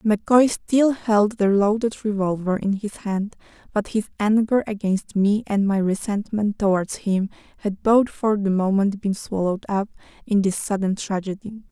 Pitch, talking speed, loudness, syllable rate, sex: 205 Hz, 160 wpm, -22 LUFS, 4.5 syllables/s, female